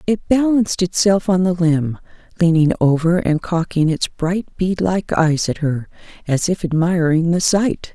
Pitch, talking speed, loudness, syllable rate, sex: 175 Hz, 165 wpm, -17 LUFS, 4.3 syllables/s, female